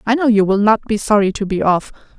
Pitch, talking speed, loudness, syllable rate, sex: 210 Hz, 275 wpm, -15 LUFS, 6.3 syllables/s, female